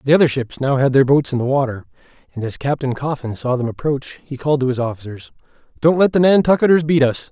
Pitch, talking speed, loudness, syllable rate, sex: 135 Hz, 230 wpm, -17 LUFS, 6.3 syllables/s, male